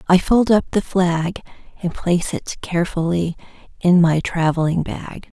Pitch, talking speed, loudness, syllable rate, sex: 175 Hz, 145 wpm, -19 LUFS, 4.6 syllables/s, female